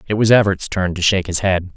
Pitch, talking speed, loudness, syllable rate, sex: 95 Hz, 275 wpm, -16 LUFS, 6.3 syllables/s, male